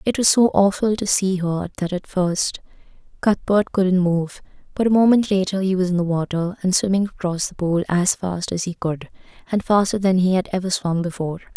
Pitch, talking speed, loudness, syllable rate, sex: 185 Hz, 210 wpm, -20 LUFS, 5.2 syllables/s, female